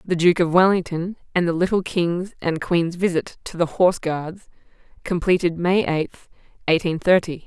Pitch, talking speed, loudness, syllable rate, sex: 175 Hz, 160 wpm, -21 LUFS, 4.7 syllables/s, female